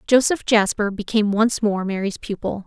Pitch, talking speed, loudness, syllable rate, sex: 210 Hz, 160 wpm, -20 LUFS, 5.1 syllables/s, female